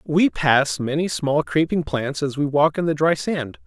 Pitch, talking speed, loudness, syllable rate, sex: 145 Hz, 215 wpm, -21 LUFS, 4.3 syllables/s, male